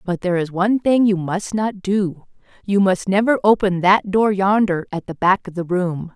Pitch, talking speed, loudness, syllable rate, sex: 190 Hz, 215 wpm, -18 LUFS, 4.9 syllables/s, female